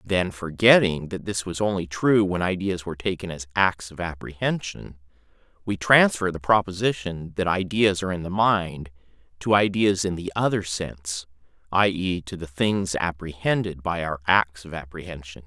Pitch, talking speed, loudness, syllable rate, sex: 90 Hz, 165 wpm, -23 LUFS, 4.9 syllables/s, male